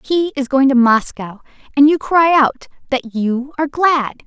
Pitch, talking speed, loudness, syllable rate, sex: 275 Hz, 185 wpm, -15 LUFS, 4.5 syllables/s, female